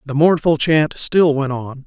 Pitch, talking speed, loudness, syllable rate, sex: 145 Hz, 195 wpm, -16 LUFS, 4.0 syllables/s, male